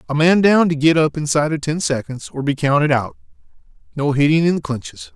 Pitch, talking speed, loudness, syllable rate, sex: 150 Hz, 220 wpm, -17 LUFS, 6.0 syllables/s, male